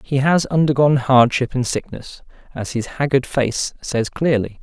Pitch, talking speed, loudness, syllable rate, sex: 130 Hz, 155 wpm, -18 LUFS, 4.6 syllables/s, male